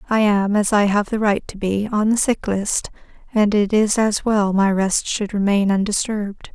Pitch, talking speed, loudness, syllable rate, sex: 205 Hz, 210 wpm, -19 LUFS, 4.6 syllables/s, female